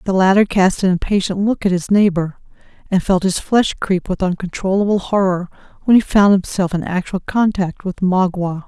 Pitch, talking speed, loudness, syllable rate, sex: 190 Hz, 180 wpm, -17 LUFS, 5.1 syllables/s, female